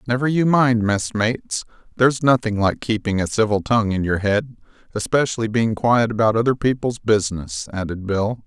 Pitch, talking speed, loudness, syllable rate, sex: 110 Hz, 165 wpm, -20 LUFS, 5.4 syllables/s, male